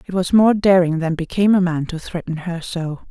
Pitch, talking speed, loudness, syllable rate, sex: 175 Hz, 230 wpm, -18 LUFS, 5.5 syllables/s, female